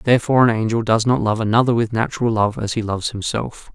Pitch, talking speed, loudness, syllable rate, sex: 115 Hz, 225 wpm, -18 LUFS, 6.5 syllables/s, male